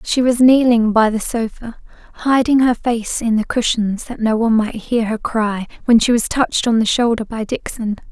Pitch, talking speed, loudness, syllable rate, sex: 230 Hz, 205 wpm, -16 LUFS, 4.9 syllables/s, female